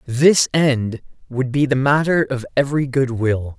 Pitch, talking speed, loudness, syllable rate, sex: 135 Hz, 170 wpm, -18 LUFS, 4.3 syllables/s, male